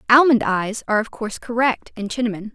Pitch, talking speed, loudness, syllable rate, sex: 225 Hz, 190 wpm, -20 LUFS, 6.1 syllables/s, female